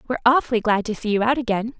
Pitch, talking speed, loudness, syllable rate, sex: 230 Hz, 265 wpm, -20 LUFS, 7.8 syllables/s, female